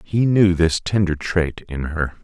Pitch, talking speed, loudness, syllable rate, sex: 85 Hz, 190 wpm, -19 LUFS, 4.0 syllables/s, male